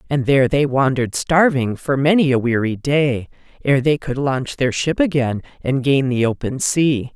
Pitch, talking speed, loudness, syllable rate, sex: 135 Hz, 185 wpm, -18 LUFS, 4.7 syllables/s, female